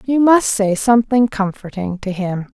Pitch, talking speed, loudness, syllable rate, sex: 210 Hz, 165 wpm, -16 LUFS, 4.5 syllables/s, female